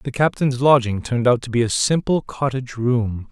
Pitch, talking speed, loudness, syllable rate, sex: 125 Hz, 200 wpm, -19 LUFS, 5.4 syllables/s, male